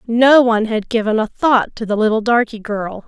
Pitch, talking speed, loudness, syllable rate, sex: 225 Hz, 215 wpm, -15 LUFS, 5.2 syllables/s, female